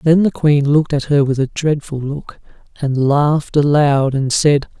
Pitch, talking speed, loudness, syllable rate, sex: 145 Hz, 190 wpm, -15 LUFS, 4.5 syllables/s, male